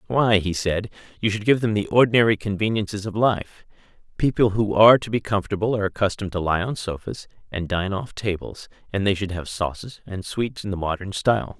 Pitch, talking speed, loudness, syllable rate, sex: 100 Hz, 200 wpm, -22 LUFS, 5.9 syllables/s, male